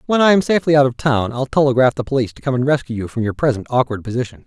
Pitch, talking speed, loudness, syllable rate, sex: 130 Hz, 280 wpm, -17 LUFS, 7.5 syllables/s, male